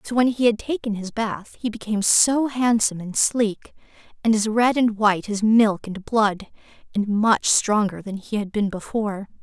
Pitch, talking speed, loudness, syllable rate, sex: 215 Hz, 190 wpm, -21 LUFS, 4.7 syllables/s, female